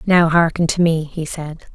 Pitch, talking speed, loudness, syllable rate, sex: 165 Hz, 205 wpm, -17 LUFS, 4.6 syllables/s, female